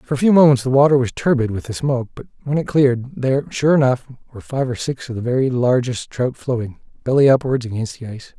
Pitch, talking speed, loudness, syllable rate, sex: 130 Hz, 235 wpm, -18 LUFS, 6.4 syllables/s, male